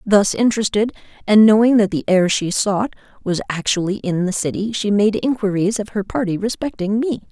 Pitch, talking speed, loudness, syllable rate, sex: 205 Hz, 180 wpm, -18 LUFS, 5.3 syllables/s, female